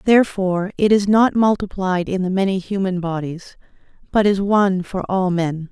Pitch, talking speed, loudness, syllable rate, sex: 190 Hz, 170 wpm, -18 LUFS, 5.0 syllables/s, female